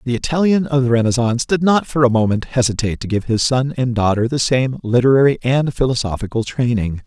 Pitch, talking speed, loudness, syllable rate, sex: 125 Hz, 195 wpm, -17 LUFS, 6.0 syllables/s, male